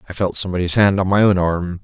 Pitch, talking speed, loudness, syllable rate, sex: 95 Hz, 260 wpm, -17 LUFS, 6.7 syllables/s, male